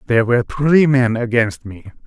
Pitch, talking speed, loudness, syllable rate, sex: 125 Hz, 175 wpm, -15 LUFS, 5.1 syllables/s, male